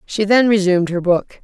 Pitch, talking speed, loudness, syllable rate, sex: 195 Hz, 210 wpm, -15 LUFS, 5.3 syllables/s, female